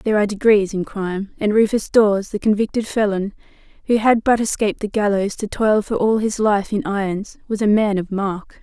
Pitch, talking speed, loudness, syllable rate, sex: 210 Hz, 210 wpm, -19 LUFS, 5.5 syllables/s, female